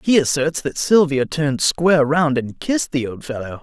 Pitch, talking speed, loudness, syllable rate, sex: 145 Hz, 200 wpm, -18 LUFS, 5.4 syllables/s, male